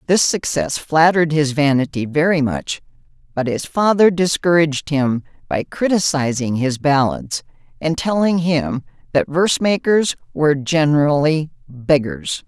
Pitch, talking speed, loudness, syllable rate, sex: 155 Hz, 120 wpm, -17 LUFS, 4.5 syllables/s, female